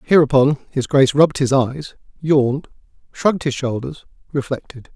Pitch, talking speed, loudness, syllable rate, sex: 140 Hz, 135 wpm, -18 LUFS, 5.3 syllables/s, male